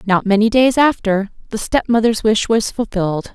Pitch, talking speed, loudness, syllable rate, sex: 215 Hz, 160 wpm, -16 LUFS, 5.0 syllables/s, female